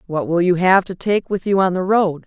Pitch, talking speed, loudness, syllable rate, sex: 185 Hz, 290 wpm, -17 LUFS, 5.2 syllables/s, female